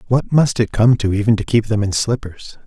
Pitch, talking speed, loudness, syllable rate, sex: 110 Hz, 250 wpm, -16 LUFS, 5.3 syllables/s, male